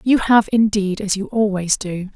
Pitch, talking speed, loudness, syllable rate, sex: 205 Hz, 195 wpm, -18 LUFS, 4.5 syllables/s, female